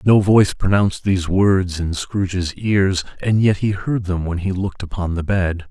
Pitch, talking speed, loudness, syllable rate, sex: 95 Hz, 200 wpm, -19 LUFS, 4.8 syllables/s, male